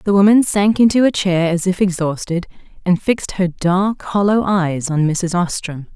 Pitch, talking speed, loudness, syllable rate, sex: 185 Hz, 180 wpm, -16 LUFS, 4.5 syllables/s, female